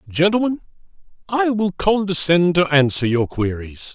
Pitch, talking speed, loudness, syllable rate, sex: 165 Hz, 120 wpm, -18 LUFS, 4.5 syllables/s, male